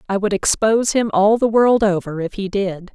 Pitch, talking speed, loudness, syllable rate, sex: 205 Hz, 225 wpm, -17 LUFS, 5.1 syllables/s, female